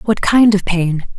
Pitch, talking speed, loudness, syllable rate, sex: 195 Hz, 205 wpm, -14 LUFS, 3.7 syllables/s, female